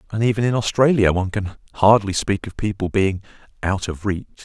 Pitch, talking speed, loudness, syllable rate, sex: 100 Hz, 190 wpm, -20 LUFS, 5.4 syllables/s, male